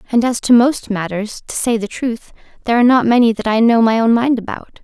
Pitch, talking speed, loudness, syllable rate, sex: 230 Hz, 250 wpm, -15 LUFS, 5.9 syllables/s, female